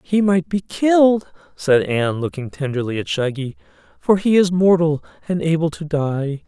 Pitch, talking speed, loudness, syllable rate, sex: 155 Hz, 165 wpm, -19 LUFS, 4.6 syllables/s, male